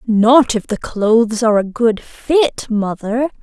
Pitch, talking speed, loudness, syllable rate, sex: 230 Hz, 160 wpm, -15 LUFS, 3.8 syllables/s, female